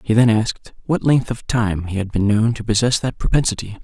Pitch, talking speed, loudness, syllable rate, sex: 115 Hz, 235 wpm, -19 LUFS, 5.6 syllables/s, male